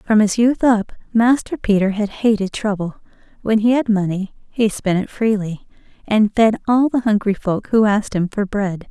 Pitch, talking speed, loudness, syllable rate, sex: 210 Hz, 190 wpm, -18 LUFS, 4.7 syllables/s, female